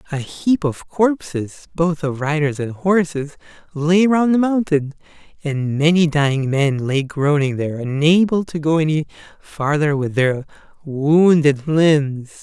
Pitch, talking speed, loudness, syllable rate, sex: 155 Hz, 140 wpm, -18 LUFS, 4.0 syllables/s, male